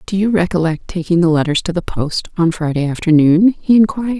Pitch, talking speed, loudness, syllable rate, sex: 175 Hz, 200 wpm, -15 LUFS, 5.8 syllables/s, female